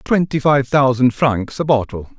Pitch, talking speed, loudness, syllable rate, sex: 130 Hz, 165 wpm, -16 LUFS, 4.3 syllables/s, male